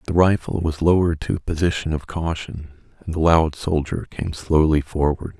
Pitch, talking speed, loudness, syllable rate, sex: 80 Hz, 180 wpm, -21 LUFS, 5.1 syllables/s, male